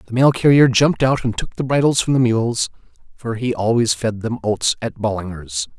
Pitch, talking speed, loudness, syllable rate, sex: 115 Hz, 205 wpm, -18 LUFS, 5.2 syllables/s, male